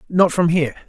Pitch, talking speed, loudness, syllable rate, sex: 165 Hz, 205 wpm, -17 LUFS, 6.7 syllables/s, male